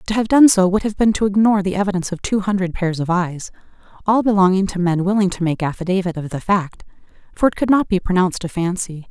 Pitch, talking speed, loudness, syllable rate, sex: 190 Hz, 230 wpm, -18 LUFS, 6.5 syllables/s, female